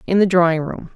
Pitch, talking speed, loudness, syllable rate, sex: 175 Hz, 250 wpm, -17 LUFS, 6.3 syllables/s, female